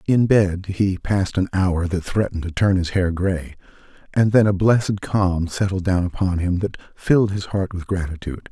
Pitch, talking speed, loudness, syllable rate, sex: 95 Hz, 195 wpm, -20 LUFS, 5.0 syllables/s, male